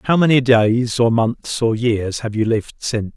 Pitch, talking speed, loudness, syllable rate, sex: 115 Hz, 210 wpm, -17 LUFS, 4.7 syllables/s, male